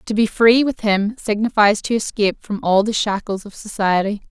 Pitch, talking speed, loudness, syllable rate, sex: 210 Hz, 195 wpm, -18 LUFS, 5.1 syllables/s, female